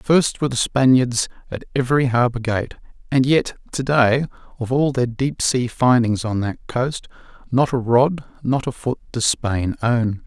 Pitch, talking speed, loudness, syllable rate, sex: 125 Hz, 170 wpm, -19 LUFS, 4.4 syllables/s, male